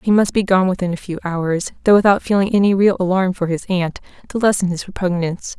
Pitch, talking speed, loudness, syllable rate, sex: 190 Hz, 225 wpm, -17 LUFS, 6.0 syllables/s, female